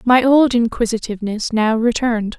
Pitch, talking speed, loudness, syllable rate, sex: 230 Hz, 125 wpm, -16 LUFS, 5.2 syllables/s, female